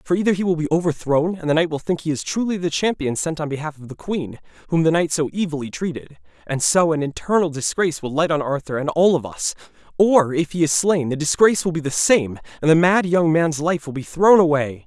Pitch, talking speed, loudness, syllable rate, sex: 160 Hz, 250 wpm, -19 LUFS, 5.9 syllables/s, male